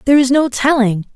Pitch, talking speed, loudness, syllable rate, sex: 260 Hz, 210 wpm, -14 LUFS, 6.0 syllables/s, female